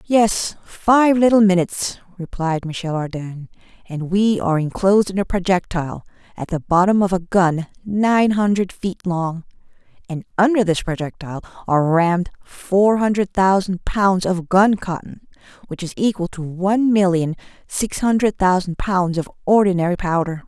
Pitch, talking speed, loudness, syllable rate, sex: 185 Hz, 145 wpm, -18 LUFS, 4.8 syllables/s, female